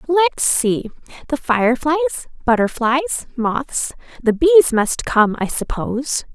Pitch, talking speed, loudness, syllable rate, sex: 265 Hz, 105 wpm, -18 LUFS, 4.0 syllables/s, female